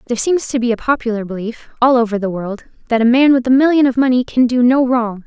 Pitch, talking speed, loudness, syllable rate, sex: 240 Hz, 260 wpm, -15 LUFS, 6.4 syllables/s, female